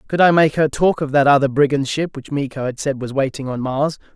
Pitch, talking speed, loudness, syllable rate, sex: 140 Hz, 260 wpm, -18 LUFS, 5.7 syllables/s, male